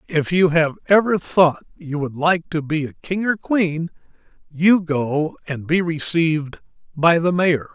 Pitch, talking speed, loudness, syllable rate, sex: 165 Hz, 170 wpm, -19 LUFS, 4.0 syllables/s, male